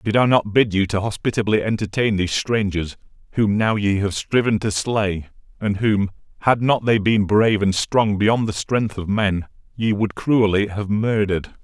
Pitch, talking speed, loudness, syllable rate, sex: 105 Hz, 185 wpm, -20 LUFS, 4.7 syllables/s, male